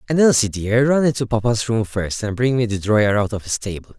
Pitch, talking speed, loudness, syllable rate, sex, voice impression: 115 Hz, 255 wpm, -19 LUFS, 5.8 syllables/s, male, masculine, adult-like, tensed, powerful, slightly hard, clear, fluent, slightly refreshing, friendly, slightly wild, lively, slightly strict, slightly intense